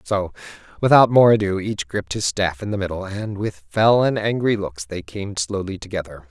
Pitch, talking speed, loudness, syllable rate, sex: 100 Hz, 200 wpm, -20 LUFS, 5.1 syllables/s, male